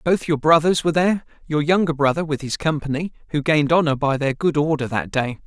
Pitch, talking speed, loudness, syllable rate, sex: 155 Hz, 220 wpm, -20 LUFS, 6.1 syllables/s, male